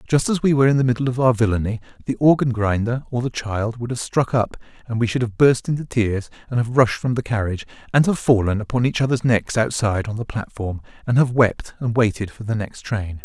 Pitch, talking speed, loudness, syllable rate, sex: 115 Hz, 240 wpm, -20 LUFS, 5.9 syllables/s, male